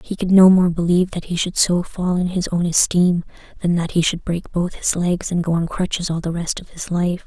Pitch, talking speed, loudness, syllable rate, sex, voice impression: 175 Hz, 265 wpm, -19 LUFS, 5.3 syllables/s, female, feminine, adult-like, relaxed, slightly weak, slightly bright, soft, raspy, calm, friendly, reassuring, elegant, kind, modest